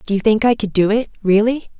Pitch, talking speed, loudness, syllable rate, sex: 215 Hz, 265 wpm, -16 LUFS, 6.1 syllables/s, female